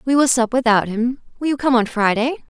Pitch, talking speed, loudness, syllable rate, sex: 245 Hz, 230 wpm, -18 LUFS, 5.5 syllables/s, female